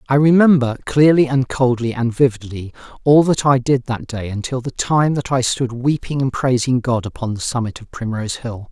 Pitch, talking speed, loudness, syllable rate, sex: 125 Hz, 200 wpm, -17 LUFS, 5.2 syllables/s, male